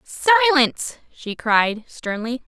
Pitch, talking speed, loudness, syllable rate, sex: 255 Hz, 95 wpm, -19 LUFS, 3.3 syllables/s, female